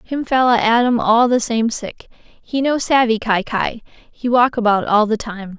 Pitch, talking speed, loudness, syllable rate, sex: 230 Hz, 195 wpm, -17 LUFS, 4.2 syllables/s, female